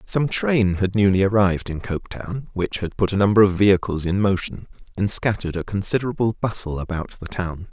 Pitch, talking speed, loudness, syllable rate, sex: 100 Hz, 185 wpm, -21 LUFS, 5.7 syllables/s, male